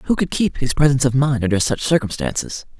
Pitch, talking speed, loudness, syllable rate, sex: 130 Hz, 215 wpm, -18 LUFS, 6.0 syllables/s, male